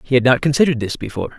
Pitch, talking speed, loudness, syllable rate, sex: 130 Hz, 260 wpm, -17 LUFS, 8.5 syllables/s, male